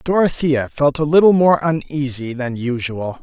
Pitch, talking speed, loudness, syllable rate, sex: 145 Hz, 150 wpm, -17 LUFS, 4.5 syllables/s, male